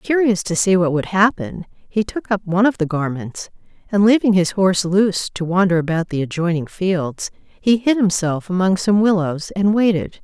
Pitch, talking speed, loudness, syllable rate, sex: 185 Hz, 190 wpm, -18 LUFS, 4.9 syllables/s, female